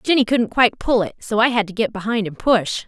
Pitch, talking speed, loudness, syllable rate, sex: 220 Hz, 270 wpm, -19 LUFS, 5.7 syllables/s, female